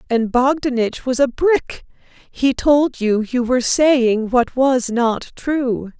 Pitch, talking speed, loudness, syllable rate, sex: 250 Hz, 150 wpm, -17 LUFS, 3.4 syllables/s, female